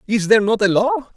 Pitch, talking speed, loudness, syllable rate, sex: 210 Hz, 260 wpm, -16 LUFS, 8.0 syllables/s, male